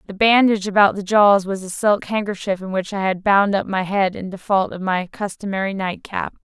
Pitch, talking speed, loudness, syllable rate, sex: 195 Hz, 215 wpm, -19 LUFS, 5.4 syllables/s, female